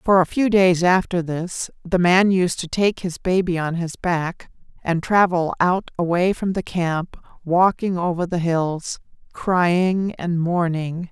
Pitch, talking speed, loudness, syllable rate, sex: 175 Hz, 160 wpm, -20 LUFS, 3.7 syllables/s, female